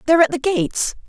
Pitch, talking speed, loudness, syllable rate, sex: 300 Hz, 220 wpm, -18 LUFS, 7.2 syllables/s, female